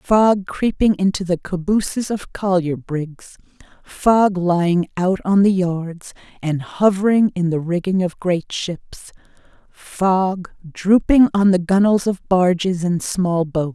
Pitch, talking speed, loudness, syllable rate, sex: 185 Hz, 140 wpm, -18 LUFS, 3.7 syllables/s, female